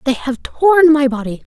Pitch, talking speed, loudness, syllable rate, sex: 280 Hz, 195 wpm, -14 LUFS, 4.4 syllables/s, female